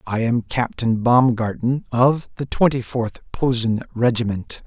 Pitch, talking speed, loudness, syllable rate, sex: 120 Hz, 130 wpm, -20 LUFS, 4.2 syllables/s, male